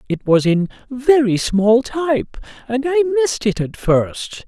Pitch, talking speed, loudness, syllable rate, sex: 245 Hz, 160 wpm, -17 LUFS, 4.0 syllables/s, male